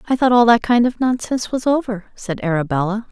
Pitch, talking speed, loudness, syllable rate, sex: 225 Hz, 210 wpm, -17 LUFS, 6.0 syllables/s, female